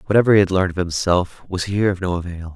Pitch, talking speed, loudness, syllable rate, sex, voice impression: 95 Hz, 260 wpm, -19 LUFS, 7.3 syllables/s, male, very masculine, slightly young, adult-like, dark, slightly soft, slightly muffled, fluent, cool, intellectual, very sincere, very calm, slightly mature, slightly friendly, slightly reassuring, slightly sweet, slightly kind, slightly modest